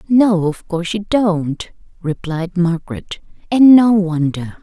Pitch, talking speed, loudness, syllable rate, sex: 185 Hz, 130 wpm, -15 LUFS, 3.9 syllables/s, female